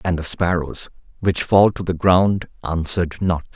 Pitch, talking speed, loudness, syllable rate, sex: 90 Hz, 170 wpm, -19 LUFS, 4.4 syllables/s, male